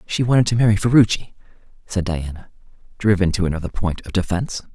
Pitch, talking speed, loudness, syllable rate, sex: 100 Hz, 165 wpm, -19 LUFS, 6.6 syllables/s, male